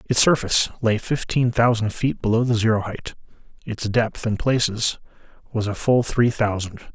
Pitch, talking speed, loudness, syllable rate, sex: 115 Hz, 165 wpm, -21 LUFS, 4.8 syllables/s, male